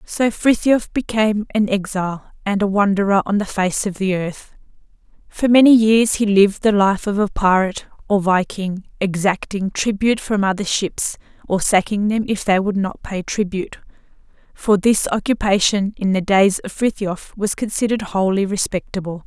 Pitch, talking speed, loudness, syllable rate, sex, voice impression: 200 Hz, 160 wpm, -18 LUFS, 5.0 syllables/s, female, feminine, adult-like, tensed, powerful, slightly bright, clear, intellectual, calm, friendly, reassuring, slightly elegant, lively, kind